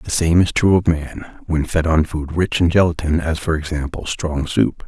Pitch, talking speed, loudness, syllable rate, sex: 80 Hz, 220 wpm, -18 LUFS, 4.8 syllables/s, male